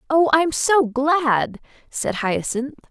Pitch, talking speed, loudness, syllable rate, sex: 280 Hz, 125 wpm, -20 LUFS, 3.1 syllables/s, female